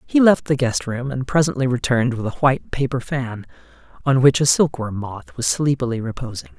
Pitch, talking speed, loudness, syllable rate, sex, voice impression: 125 Hz, 190 wpm, -20 LUFS, 5.4 syllables/s, male, masculine, slightly adult-like, slightly thick, very tensed, powerful, very bright, slightly soft, very clear, fluent, slightly raspy, very cool, intellectual, very refreshing, very sincere, calm, slightly mature, very friendly, very reassuring, unique, very elegant, slightly wild, sweet, very lively, kind, slightly intense